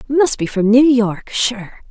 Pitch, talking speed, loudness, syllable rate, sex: 235 Hz, 190 wpm, -15 LUFS, 3.6 syllables/s, female